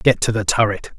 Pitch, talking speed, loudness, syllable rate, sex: 110 Hz, 245 wpm, -18 LUFS, 5.6 syllables/s, male